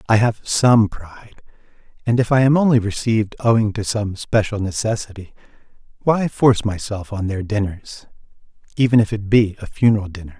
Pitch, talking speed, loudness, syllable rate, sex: 110 Hz, 160 wpm, -18 LUFS, 5.5 syllables/s, male